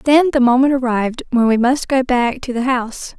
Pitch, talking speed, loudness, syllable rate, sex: 250 Hz, 225 wpm, -16 LUFS, 5.2 syllables/s, female